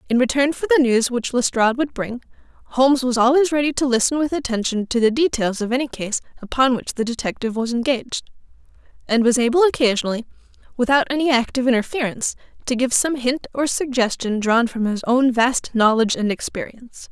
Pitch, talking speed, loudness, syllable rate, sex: 250 Hz, 180 wpm, -19 LUFS, 6.1 syllables/s, female